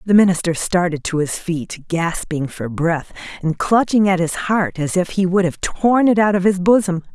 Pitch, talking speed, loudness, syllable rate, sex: 180 Hz, 210 wpm, -18 LUFS, 4.7 syllables/s, female